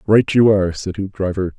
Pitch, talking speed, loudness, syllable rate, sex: 95 Hz, 190 wpm, -17 LUFS, 5.6 syllables/s, male